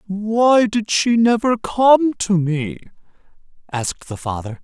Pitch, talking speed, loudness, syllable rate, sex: 200 Hz, 130 wpm, -17 LUFS, 3.8 syllables/s, male